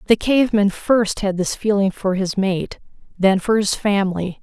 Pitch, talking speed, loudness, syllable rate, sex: 200 Hz, 175 wpm, -18 LUFS, 4.6 syllables/s, female